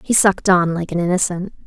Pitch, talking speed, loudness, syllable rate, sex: 180 Hz, 215 wpm, -17 LUFS, 6.2 syllables/s, female